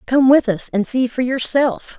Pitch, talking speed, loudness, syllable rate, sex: 250 Hz, 210 wpm, -17 LUFS, 4.4 syllables/s, female